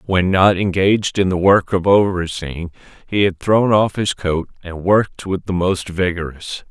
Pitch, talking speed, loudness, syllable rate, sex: 95 Hz, 180 wpm, -17 LUFS, 4.5 syllables/s, male